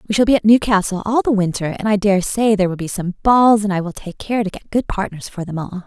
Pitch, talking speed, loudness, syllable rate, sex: 200 Hz, 295 wpm, -17 LUFS, 6.1 syllables/s, female